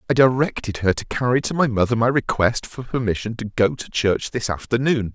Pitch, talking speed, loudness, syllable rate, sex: 120 Hz, 210 wpm, -21 LUFS, 5.5 syllables/s, male